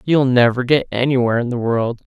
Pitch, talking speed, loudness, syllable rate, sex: 125 Hz, 200 wpm, -17 LUFS, 5.7 syllables/s, male